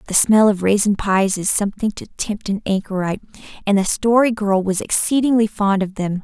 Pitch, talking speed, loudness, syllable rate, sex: 205 Hz, 190 wpm, -18 LUFS, 5.4 syllables/s, female